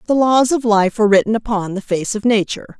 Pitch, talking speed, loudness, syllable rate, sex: 215 Hz, 235 wpm, -16 LUFS, 6.1 syllables/s, female